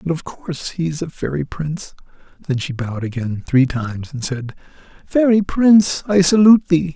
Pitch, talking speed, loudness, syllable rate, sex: 160 Hz, 180 wpm, -18 LUFS, 5.4 syllables/s, male